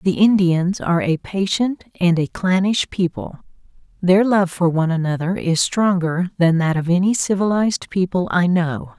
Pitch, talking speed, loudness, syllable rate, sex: 180 Hz, 160 wpm, -18 LUFS, 4.8 syllables/s, female